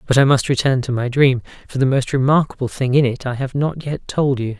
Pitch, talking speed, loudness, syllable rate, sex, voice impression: 130 Hz, 260 wpm, -18 LUFS, 5.7 syllables/s, male, masculine, adult-like, slightly fluent, refreshing, slightly sincere, slightly calm, slightly unique